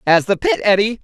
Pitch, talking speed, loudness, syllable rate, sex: 210 Hz, 230 wpm, -15 LUFS, 5.8 syllables/s, female